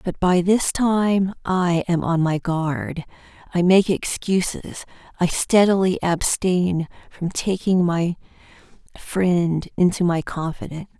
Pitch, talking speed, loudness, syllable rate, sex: 180 Hz, 120 wpm, -20 LUFS, 3.6 syllables/s, female